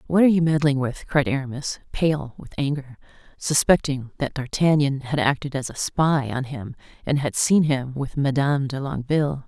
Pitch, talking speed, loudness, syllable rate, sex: 140 Hz, 175 wpm, -22 LUFS, 5.1 syllables/s, female